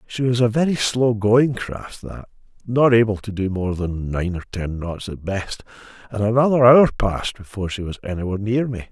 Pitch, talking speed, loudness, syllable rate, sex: 110 Hz, 190 wpm, -20 LUFS, 5.2 syllables/s, male